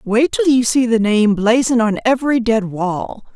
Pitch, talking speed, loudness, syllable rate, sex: 230 Hz, 195 wpm, -15 LUFS, 4.8 syllables/s, female